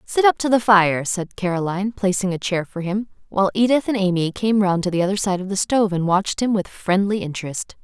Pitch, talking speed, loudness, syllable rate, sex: 195 Hz, 235 wpm, -20 LUFS, 5.9 syllables/s, female